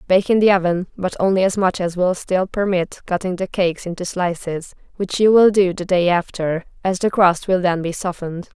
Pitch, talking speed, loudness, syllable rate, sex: 185 Hz, 215 wpm, -19 LUFS, 5.3 syllables/s, female